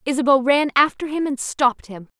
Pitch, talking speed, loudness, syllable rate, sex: 270 Hz, 190 wpm, -19 LUFS, 5.7 syllables/s, female